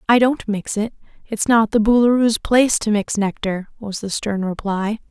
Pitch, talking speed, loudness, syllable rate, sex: 215 Hz, 190 wpm, -19 LUFS, 4.8 syllables/s, female